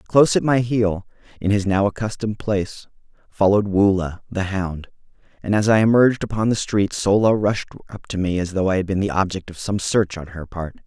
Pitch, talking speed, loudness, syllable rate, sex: 100 Hz, 210 wpm, -20 LUFS, 5.6 syllables/s, male